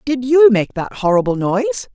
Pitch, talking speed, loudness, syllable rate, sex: 225 Hz, 185 wpm, -15 LUFS, 5.7 syllables/s, female